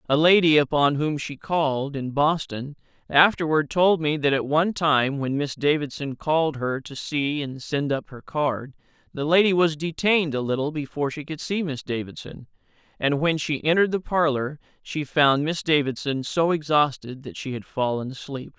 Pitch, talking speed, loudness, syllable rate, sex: 145 Hz, 180 wpm, -23 LUFS, 4.9 syllables/s, male